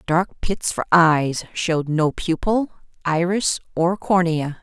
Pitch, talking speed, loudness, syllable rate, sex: 170 Hz, 130 wpm, -20 LUFS, 3.6 syllables/s, female